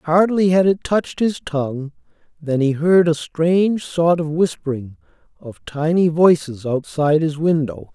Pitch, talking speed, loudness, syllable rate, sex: 160 Hz, 150 wpm, -18 LUFS, 4.5 syllables/s, male